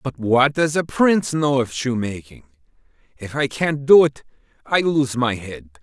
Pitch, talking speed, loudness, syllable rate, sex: 135 Hz, 175 wpm, -19 LUFS, 4.5 syllables/s, male